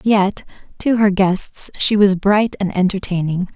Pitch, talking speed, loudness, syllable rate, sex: 195 Hz, 150 wpm, -17 LUFS, 4.0 syllables/s, female